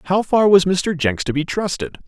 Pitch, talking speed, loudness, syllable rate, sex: 180 Hz, 230 wpm, -18 LUFS, 5.0 syllables/s, male